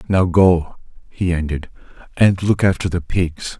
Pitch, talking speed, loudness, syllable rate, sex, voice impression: 90 Hz, 150 wpm, -18 LUFS, 4.2 syllables/s, male, masculine, adult-like, slightly thick, cool, sincere, calm